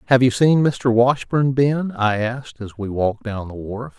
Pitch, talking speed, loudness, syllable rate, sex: 120 Hz, 210 wpm, -19 LUFS, 4.5 syllables/s, male